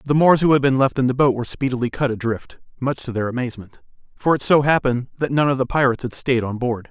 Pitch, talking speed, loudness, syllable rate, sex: 130 Hz, 260 wpm, -20 LUFS, 6.7 syllables/s, male